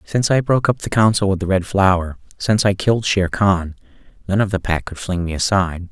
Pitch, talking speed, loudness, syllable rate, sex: 95 Hz, 215 wpm, -18 LUFS, 6.3 syllables/s, male